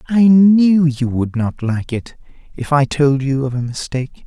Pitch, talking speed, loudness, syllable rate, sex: 145 Hz, 195 wpm, -16 LUFS, 4.2 syllables/s, male